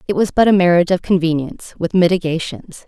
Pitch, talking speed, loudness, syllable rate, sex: 175 Hz, 190 wpm, -16 LUFS, 6.3 syllables/s, female